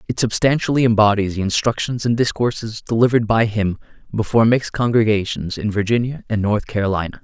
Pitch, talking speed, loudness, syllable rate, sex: 110 Hz, 150 wpm, -18 LUFS, 6.1 syllables/s, male